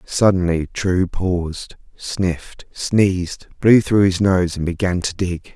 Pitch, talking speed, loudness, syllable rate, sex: 90 Hz, 140 wpm, -18 LUFS, 3.7 syllables/s, male